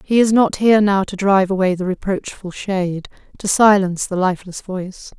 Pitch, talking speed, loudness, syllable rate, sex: 195 Hz, 175 wpm, -17 LUFS, 5.7 syllables/s, female